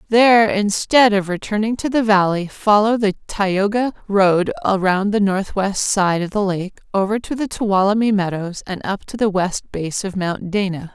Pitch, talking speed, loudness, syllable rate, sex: 200 Hz, 175 wpm, -18 LUFS, 4.6 syllables/s, female